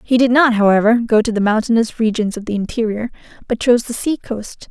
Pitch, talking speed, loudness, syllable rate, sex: 225 Hz, 215 wpm, -16 LUFS, 5.9 syllables/s, female